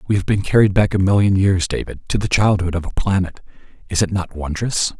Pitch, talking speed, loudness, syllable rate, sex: 95 Hz, 215 wpm, -18 LUFS, 6.0 syllables/s, male